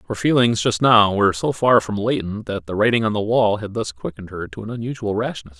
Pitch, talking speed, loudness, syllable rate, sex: 105 Hz, 245 wpm, -19 LUFS, 6.0 syllables/s, male